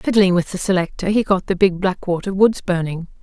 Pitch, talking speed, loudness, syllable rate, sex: 190 Hz, 205 wpm, -18 LUFS, 5.6 syllables/s, female